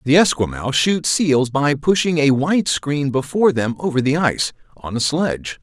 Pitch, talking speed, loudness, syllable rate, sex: 145 Hz, 180 wpm, -18 LUFS, 5.0 syllables/s, male